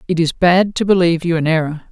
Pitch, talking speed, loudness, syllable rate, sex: 170 Hz, 250 wpm, -15 LUFS, 6.4 syllables/s, female